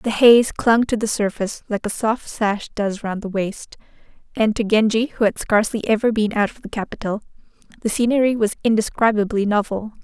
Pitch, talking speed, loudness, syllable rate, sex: 220 Hz, 185 wpm, -20 LUFS, 5.4 syllables/s, female